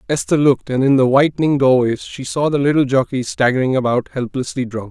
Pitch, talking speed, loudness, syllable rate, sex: 130 Hz, 195 wpm, -16 LUFS, 5.9 syllables/s, male